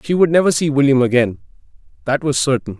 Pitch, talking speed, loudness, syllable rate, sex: 140 Hz, 170 wpm, -16 LUFS, 6.4 syllables/s, male